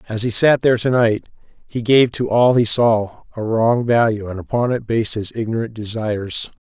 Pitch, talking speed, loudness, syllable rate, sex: 115 Hz, 200 wpm, -17 LUFS, 5.1 syllables/s, male